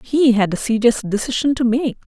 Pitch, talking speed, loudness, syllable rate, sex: 240 Hz, 195 wpm, -18 LUFS, 5.4 syllables/s, female